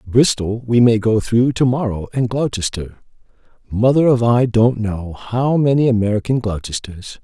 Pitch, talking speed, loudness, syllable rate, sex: 115 Hz, 150 wpm, -17 LUFS, 4.6 syllables/s, male